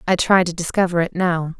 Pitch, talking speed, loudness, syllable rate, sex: 175 Hz, 225 wpm, -18 LUFS, 5.6 syllables/s, female